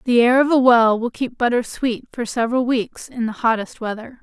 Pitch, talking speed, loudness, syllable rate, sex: 240 Hz, 225 wpm, -19 LUFS, 5.2 syllables/s, female